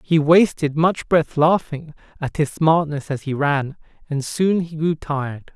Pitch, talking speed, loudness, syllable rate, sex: 155 Hz, 175 wpm, -20 LUFS, 4.1 syllables/s, male